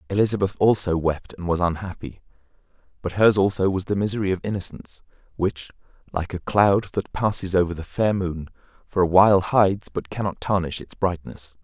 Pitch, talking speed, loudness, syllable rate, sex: 95 Hz, 170 wpm, -22 LUFS, 5.6 syllables/s, male